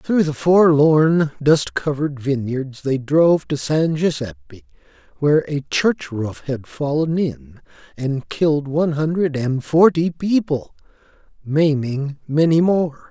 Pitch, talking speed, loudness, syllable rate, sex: 150 Hz, 130 wpm, -19 LUFS, 3.9 syllables/s, male